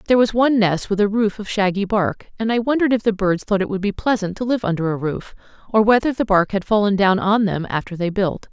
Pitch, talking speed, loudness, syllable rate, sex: 205 Hz, 270 wpm, -19 LUFS, 6.1 syllables/s, female